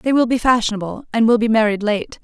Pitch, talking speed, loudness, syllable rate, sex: 225 Hz, 240 wpm, -17 LUFS, 6.1 syllables/s, female